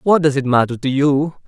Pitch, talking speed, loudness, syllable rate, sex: 140 Hz, 245 wpm, -16 LUFS, 5.5 syllables/s, male